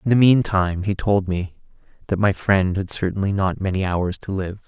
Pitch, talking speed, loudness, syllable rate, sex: 95 Hz, 205 wpm, -21 LUFS, 5.2 syllables/s, male